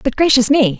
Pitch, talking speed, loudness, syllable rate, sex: 250 Hz, 225 wpm, -13 LUFS, 5.8 syllables/s, female